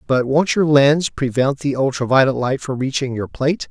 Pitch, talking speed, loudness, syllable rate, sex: 135 Hz, 210 wpm, -17 LUFS, 5.1 syllables/s, male